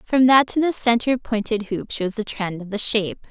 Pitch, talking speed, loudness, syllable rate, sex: 225 Hz, 235 wpm, -20 LUFS, 5.0 syllables/s, female